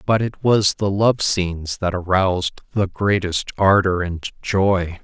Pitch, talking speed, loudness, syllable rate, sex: 95 Hz, 155 wpm, -19 LUFS, 3.9 syllables/s, male